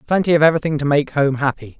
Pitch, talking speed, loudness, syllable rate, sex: 150 Hz, 235 wpm, -17 LUFS, 7.4 syllables/s, male